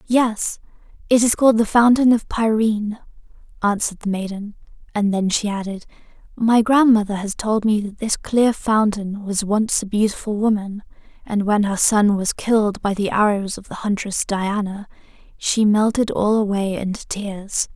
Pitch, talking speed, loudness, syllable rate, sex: 210 Hz, 160 wpm, -19 LUFS, 4.7 syllables/s, female